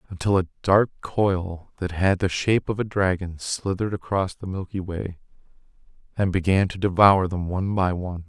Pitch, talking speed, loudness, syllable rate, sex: 95 Hz, 175 wpm, -23 LUFS, 5.2 syllables/s, male